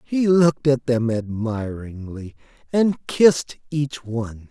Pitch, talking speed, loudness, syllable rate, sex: 130 Hz, 120 wpm, -21 LUFS, 3.9 syllables/s, male